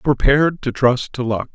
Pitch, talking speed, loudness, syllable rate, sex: 130 Hz, 195 wpm, -18 LUFS, 4.9 syllables/s, male